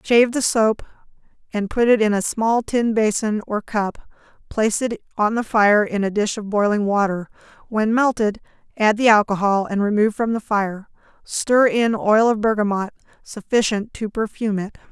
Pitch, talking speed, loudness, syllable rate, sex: 215 Hz, 175 wpm, -19 LUFS, 4.9 syllables/s, female